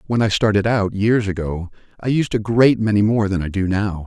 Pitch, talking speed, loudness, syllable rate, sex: 105 Hz, 235 wpm, -18 LUFS, 5.2 syllables/s, male